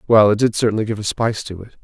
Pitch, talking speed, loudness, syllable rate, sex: 110 Hz, 295 wpm, -18 LUFS, 7.3 syllables/s, male